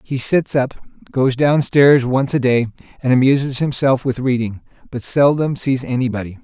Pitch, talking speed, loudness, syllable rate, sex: 130 Hz, 175 wpm, -17 LUFS, 4.7 syllables/s, male